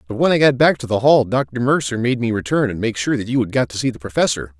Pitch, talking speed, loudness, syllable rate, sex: 120 Hz, 315 wpm, -18 LUFS, 6.4 syllables/s, male